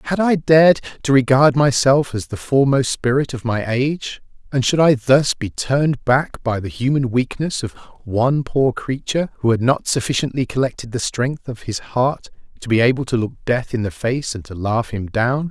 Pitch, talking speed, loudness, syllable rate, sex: 130 Hz, 200 wpm, -18 LUFS, 5.0 syllables/s, male